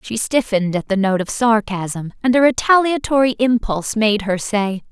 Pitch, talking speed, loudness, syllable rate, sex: 220 Hz, 170 wpm, -17 LUFS, 5.0 syllables/s, female